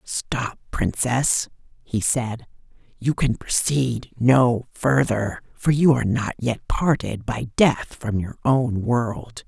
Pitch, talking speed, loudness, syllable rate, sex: 120 Hz, 135 wpm, -22 LUFS, 3.3 syllables/s, female